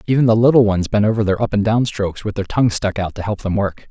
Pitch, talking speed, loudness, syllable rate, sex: 105 Hz, 310 wpm, -17 LUFS, 6.7 syllables/s, male